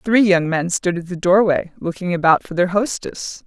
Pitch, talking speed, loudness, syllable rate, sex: 185 Hz, 210 wpm, -18 LUFS, 4.9 syllables/s, female